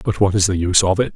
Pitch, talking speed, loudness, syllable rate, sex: 95 Hz, 365 wpm, -16 LUFS, 7.6 syllables/s, male